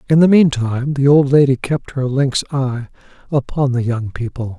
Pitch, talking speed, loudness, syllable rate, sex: 135 Hz, 195 wpm, -16 LUFS, 4.6 syllables/s, male